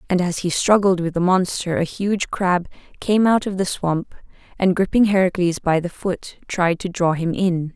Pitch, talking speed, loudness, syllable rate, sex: 180 Hz, 200 wpm, -20 LUFS, 4.6 syllables/s, female